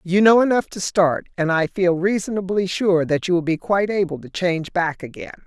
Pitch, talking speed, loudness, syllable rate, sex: 185 Hz, 220 wpm, -20 LUFS, 5.5 syllables/s, female